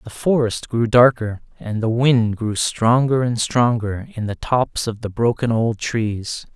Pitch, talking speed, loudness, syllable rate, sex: 115 Hz, 175 wpm, -19 LUFS, 3.9 syllables/s, male